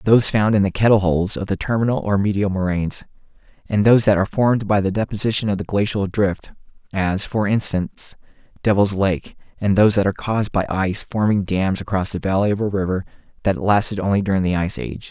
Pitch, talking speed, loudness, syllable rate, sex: 100 Hz, 205 wpm, -19 LUFS, 6.3 syllables/s, male